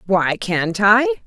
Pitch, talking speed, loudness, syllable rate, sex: 210 Hz, 145 wpm, -17 LUFS, 3.2 syllables/s, female